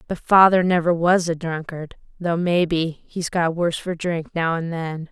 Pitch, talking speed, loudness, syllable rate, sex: 170 Hz, 190 wpm, -20 LUFS, 4.4 syllables/s, female